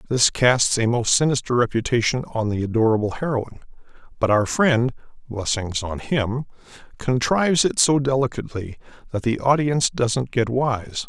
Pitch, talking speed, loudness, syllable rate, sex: 120 Hz, 140 wpm, -21 LUFS, 4.9 syllables/s, male